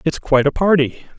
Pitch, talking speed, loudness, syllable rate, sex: 155 Hz, 200 wpm, -16 LUFS, 6.9 syllables/s, male